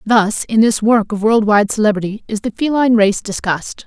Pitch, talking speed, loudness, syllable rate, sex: 215 Hz, 185 wpm, -15 LUFS, 5.4 syllables/s, female